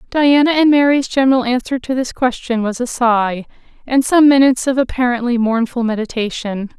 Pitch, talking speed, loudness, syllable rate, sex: 250 Hz, 160 wpm, -15 LUFS, 5.4 syllables/s, female